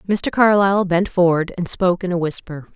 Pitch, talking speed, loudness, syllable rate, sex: 180 Hz, 195 wpm, -18 LUFS, 5.5 syllables/s, female